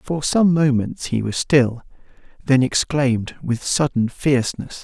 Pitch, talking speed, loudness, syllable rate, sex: 135 Hz, 135 wpm, -19 LUFS, 4.3 syllables/s, male